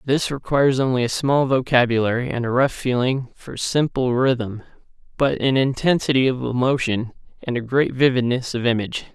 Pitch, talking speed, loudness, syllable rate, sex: 125 Hz, 155 wpm, -20 LUFS, 5.2 syllables/s, male